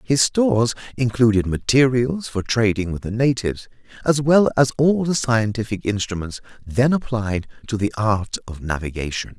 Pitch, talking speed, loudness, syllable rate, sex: 115 Hz, 145 wpm, -20 LUFS, 4.8 syllables/s, male